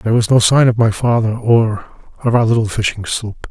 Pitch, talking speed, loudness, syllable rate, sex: 115 Hz, 240 wpm, -15 LUFS, 5.9 syllables/s, male